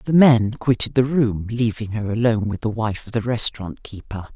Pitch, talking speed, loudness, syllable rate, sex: 115 Hz, 205 wpm, -20 LUFS, 5.2 syllables/s, female